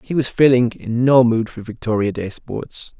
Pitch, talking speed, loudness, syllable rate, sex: 120 Hz, 200 wpm, -18 LUFS, 4.6 syllables/s, male